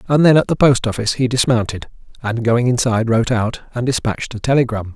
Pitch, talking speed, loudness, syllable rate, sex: 120 Hz, 205 wpm, -17 LUFS, 6.4 syllables/s, male